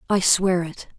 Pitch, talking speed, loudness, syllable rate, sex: 180 Hz, 185 wpm, -20 LUFS, 4.1 syllables/s, female